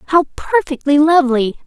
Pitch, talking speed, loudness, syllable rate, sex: 295 Hz, 110 wpm, -14 LUFS, 5.8 syllables/s, female